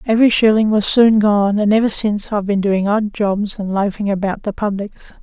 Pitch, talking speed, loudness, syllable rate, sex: 205 Hz, 195 wpm, -16 LUFS, 5.4 syllables/s, female